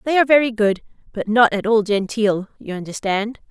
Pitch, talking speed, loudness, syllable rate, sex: 220 Hz, 190 wpm, -18 LUFS, 5.5 syllables/s, female